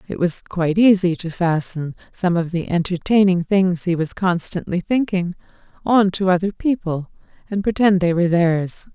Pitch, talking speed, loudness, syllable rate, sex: 180 Hz, 160 wpm, -19 LUFS, 4.8 syllables/s, female